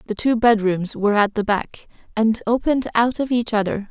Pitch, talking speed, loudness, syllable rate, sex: 220 Hz, 200 wpm, -19 LUFS, 5.3 syllables/s, female